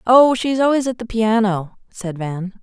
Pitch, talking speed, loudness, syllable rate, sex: 220 Hz, 185 wpm, -18 LUFS, 4.5 syllables/s, female